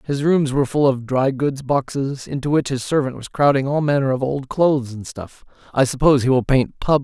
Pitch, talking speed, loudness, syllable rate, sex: 135 Hz, 230 wpm, -19 LUFS, 5.4 syllables/s, male